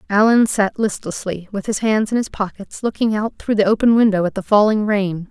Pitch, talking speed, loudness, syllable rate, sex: 210 Hz, 215 wpm, -18 LUFS, 5.3 syllables/s, female